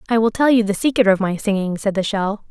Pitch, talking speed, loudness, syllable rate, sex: 210 Hz, 285 wpm, -18 LUFS, 6.2 syllables/s, female